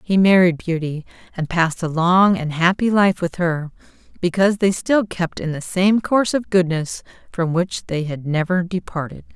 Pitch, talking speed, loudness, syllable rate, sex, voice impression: 175 Hz, 180 wpm, -19 LUFS, 4.8 syllables/s, female, feminine, slightly middle-aged, tensed, powerful, clear, fluent, intellectual, slightly friendly, reassuring, elegant, lively, intense, sharp